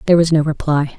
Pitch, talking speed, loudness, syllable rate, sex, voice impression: 155 Hz, 245 wpm, -16 LUFS, 7.2 syllables/s, female, feminine, adult-like, slightly intellectual, calm, elegant, slightly sweet